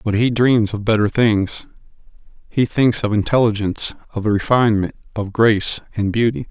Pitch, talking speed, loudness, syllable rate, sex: 110 Hz, 150 wpm, -18 LUFS, 5.1 syllables/s, male